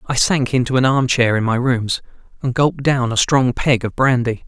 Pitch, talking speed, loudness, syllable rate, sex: 125 Hz, 230 wpm, -17 LUFS, 5.0 syllables/s, male